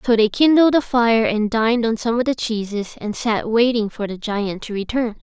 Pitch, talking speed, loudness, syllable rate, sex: 225 Hz, 225 wpm, -19 LUFS, 5.0 syllables/s, female